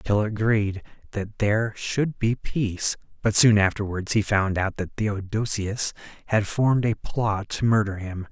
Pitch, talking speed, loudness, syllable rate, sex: 105 Hz, 160 wpm, -24 LUFS, 4.6 syllables/s, male